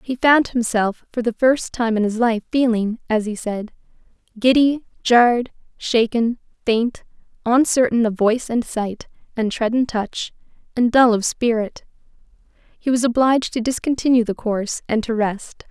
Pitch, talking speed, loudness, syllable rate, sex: 235 Hz, 155 wpm, -19 LUFS, 4.7 syllables/s, female